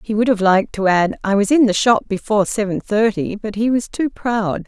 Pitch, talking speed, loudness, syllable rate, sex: 210 Hz, 245 wpm, -17 LUFS, 5.4 syllables/s, female